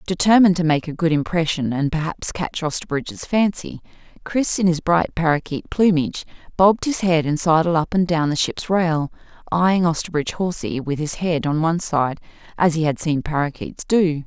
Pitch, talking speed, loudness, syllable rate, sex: 165 Hz, 180 wpm, -20 LUFS, 5.3 syllables/s, female